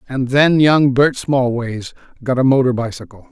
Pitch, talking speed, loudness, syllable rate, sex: 130 Hz, 165 wpm, -15 LUFS, 4.6 syllables/s, male